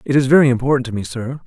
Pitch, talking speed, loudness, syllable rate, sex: 130 Hz, 285 wpm, -16 LUFS, 7.5 syllables/s, male